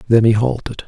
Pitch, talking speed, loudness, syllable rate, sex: 115 Hz, 205 wpm, -15 LUFS, 5.6 syllables/s, male